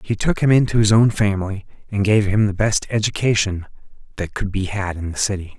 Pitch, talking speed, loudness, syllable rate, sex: 100 Hz, 215 wpm, -19 LUFS, 5.8 syllables/s, male